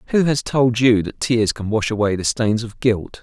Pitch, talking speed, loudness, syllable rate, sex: 115 Hz, 240 wpm, -19 LUFS, 4.7 syllables/s, male